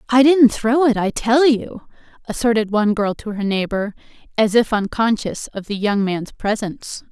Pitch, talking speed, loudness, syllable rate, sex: 220 Hz, 175 wpm, -18 LUFS, 4.8 syllables/s, female